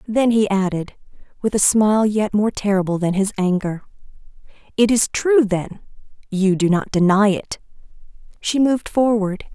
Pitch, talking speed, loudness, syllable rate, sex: 205 Hz, 150 wpm, -18 LUFS, 4.8 syllables/s, female